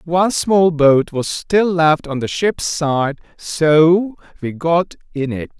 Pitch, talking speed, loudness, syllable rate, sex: 160 Hz, 160 wpm, -16 LUFS, 3.5 syllables/s, male